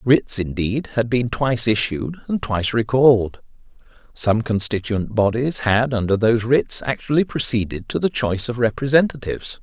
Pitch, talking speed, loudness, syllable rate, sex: 115 Hz, 145 wpm, -20 LUFS, 5.1 syllables/s, male